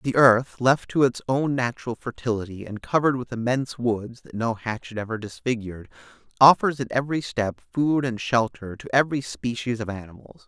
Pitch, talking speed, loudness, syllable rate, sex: 120 Hz, 170 wpm, -24 LUFS, 5.4 syllables/s, male